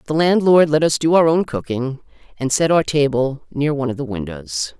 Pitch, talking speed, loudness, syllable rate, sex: 145 Hz, 215 wpm, -18 LUFS, 5.3 syllables/s, female